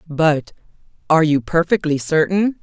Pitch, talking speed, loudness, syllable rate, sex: 165 Hz, 115 wpm, -17 LUFS, 4.7 syllables/s, female